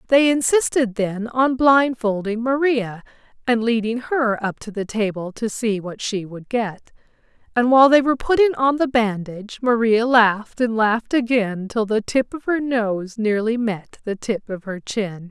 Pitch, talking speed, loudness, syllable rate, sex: 230 Hz, 175 wpm, -20 LUFS, 4.5 syllables/s, female